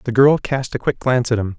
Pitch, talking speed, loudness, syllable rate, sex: 125 Hz, 300 wpm, -18 LUFS, 6.3 syllables/s, male